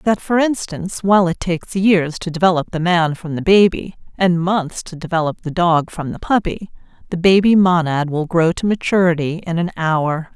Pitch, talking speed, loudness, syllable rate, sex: 175 Hz, 190 wpm, -17 LUFS, 5.0 syllables/s, female